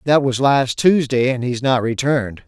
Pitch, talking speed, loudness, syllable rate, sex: 130 Hz, 220 wpm, -17 LUFS, 5.2 syllables/s, male